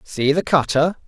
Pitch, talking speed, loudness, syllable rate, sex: 150 Hz, 170 wpm, -18 LUFS, 4.4 syllables/s, male